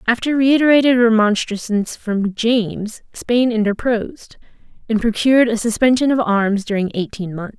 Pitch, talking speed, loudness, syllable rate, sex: 225 Hz, 125 wpm, -17 LUFS, 4.8 syllables/s, female